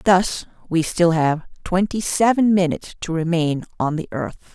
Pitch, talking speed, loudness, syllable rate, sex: 175 Hz, 160 wpm, -20 LUFS, 4.7 syllables/s, female